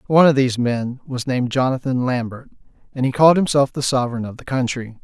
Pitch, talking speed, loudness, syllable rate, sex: 130 Hz, 205 wpm, -19 LUFS, 6.4 syllables/s, male